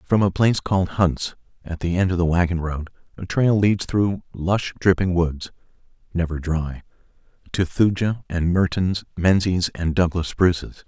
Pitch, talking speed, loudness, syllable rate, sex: 90 Hz, 160 wpm, -21 LUFS, 4.5 syllables/s, male